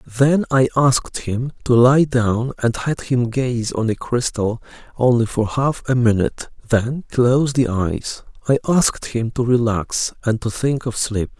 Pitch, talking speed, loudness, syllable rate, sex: 120 Hz, 175 wpm, -19 LUFS, 4.3 syllables/s, male